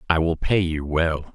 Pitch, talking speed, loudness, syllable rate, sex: 80 Hz, 225 wpm, -22 LUFS, 4.3 syllables/s, male